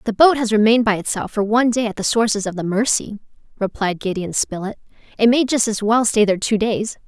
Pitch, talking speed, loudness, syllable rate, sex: 215 Hz, 230 wpm, -18 LUFS, 6.2 syllables/s, female